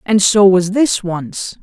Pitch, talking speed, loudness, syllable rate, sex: 200 Hz, 185 wpm, -13 LUFS, 4.0 syllables/s, female